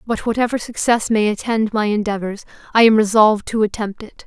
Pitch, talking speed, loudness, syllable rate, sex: 215 Hz, 185 wpm, -17 LUFS, 5.7 syllables/s, female